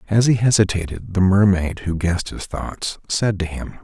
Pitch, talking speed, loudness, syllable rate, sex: 95 Hz, 190 wpm, -20 LUFS, 4.8 syllables/s, male